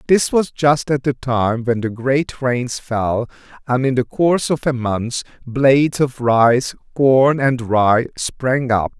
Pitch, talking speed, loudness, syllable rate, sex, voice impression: 130 Hz, 175 wpm, -17 LUFS, 3.6 syllables/s, male, masculine, adult-like, clear, refreshing, sincere, slightly unique